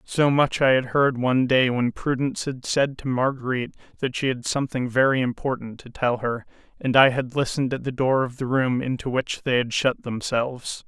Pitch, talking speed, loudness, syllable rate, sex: 130 Hz, 210 wpm, -23 LUFS, 5.3 syllables/s, male